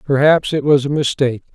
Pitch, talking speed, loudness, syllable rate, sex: 140 Hz, 195 wpm, -15 LUFS, 5.9 syllables/s, male